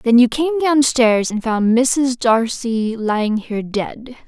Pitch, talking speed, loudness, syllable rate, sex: 240 Hz, 140 wpm, -17 LUFS, 3.6 syllables/s, female